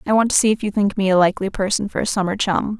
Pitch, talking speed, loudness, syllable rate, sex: 200 Hz, 320 wpm, -18 LUFS, 7.2 syllables/s, female